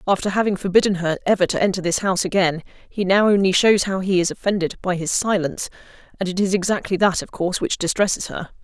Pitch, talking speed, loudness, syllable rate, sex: 190 Hz, 215 wpm, -20 LUFS, 6.5 syllables/s, female